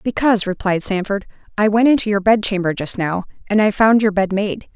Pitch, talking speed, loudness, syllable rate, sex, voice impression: 205 Hz, 215 wpm, -17 LUFS, 5.6 syllables/s, female, feminine, slightly adult-like, slightly muffled, calm, slightly elegant, slightly kind